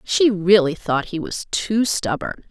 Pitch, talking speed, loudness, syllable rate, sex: 190 Hz, 170 wpm, -20 LUFS, 4.1 syllables/s, female